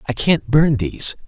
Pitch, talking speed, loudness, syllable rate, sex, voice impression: 150 Hz, 190 wpm, -17 LUFS, 4.6 syllables/s, female, feminine, adult-like, clear, fluent, intellectual, calm, sharp